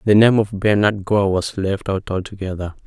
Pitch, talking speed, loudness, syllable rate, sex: 100 Hz, 190 wpm, -19 LUFS, 4.9 syllables/s, male